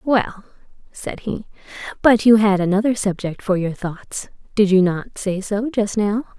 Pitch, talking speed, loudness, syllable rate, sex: 205 Hz, 170 wpm, -19 LUFS, 4.3 syllables/s, female